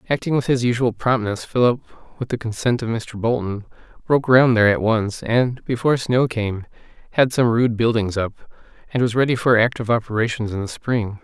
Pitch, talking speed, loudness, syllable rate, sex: 115 Hz, 185 wpm, -20 LUFS, 5.4 syllables/s, male